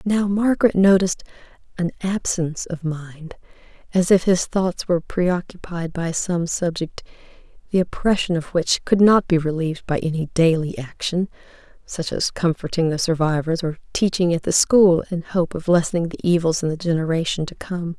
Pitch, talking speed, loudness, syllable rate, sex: 175 Hz, 170 wpm, -20 LUFS, 5.2 syllables/s, female